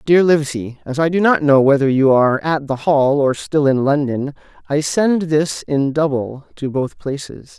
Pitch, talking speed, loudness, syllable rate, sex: 145 Hz, 190 wpm, -16 LUFS, 4.6 syllables/s, male